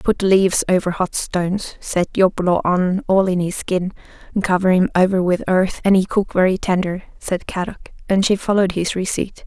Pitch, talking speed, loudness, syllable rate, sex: 185 Hz, 185 wpm, -18 LUFS, 5.2 syllables/s, female